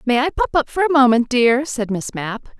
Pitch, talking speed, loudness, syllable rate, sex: 250 Hz, 255 wpm, -17 LUFS, 5.0 syllables/s, female